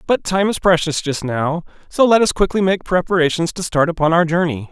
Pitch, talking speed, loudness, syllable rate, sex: 170 Hz, 215 wpm, -17 LUFS, 5.5 syllables/s, male